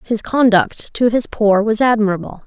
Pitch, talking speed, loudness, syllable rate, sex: 220 Hz, 170 wpm, -15 LUFS, 4.7 syllables/s, female